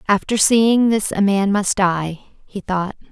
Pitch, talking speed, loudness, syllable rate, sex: 200 Hz, 175 wpm, -17 LUFS, 3.9 syllables/s, female